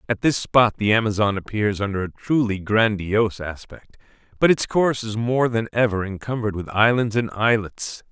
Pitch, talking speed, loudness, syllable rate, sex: 110 Hz, 170 wpm, -21 LUFS, 5.2 syllables/s, male